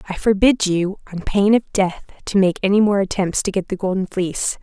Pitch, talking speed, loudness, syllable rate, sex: 195 Hz, 220 wpm, -18 LUFS, 5.4 syllables/s, female